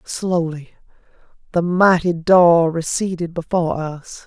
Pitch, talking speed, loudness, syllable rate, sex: 170 Hz, 100 wpm, -17 LUFS, 3.9 syllables/s, female